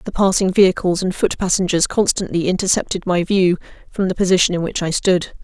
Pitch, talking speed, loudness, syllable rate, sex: 185 Hz, 190 wpm, -17 LUFS, 5.9 syllables/s, female